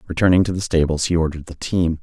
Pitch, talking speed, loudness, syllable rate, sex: 85 Hz, 235 wpm, -19 LUFS, 6.9 syllables/s, male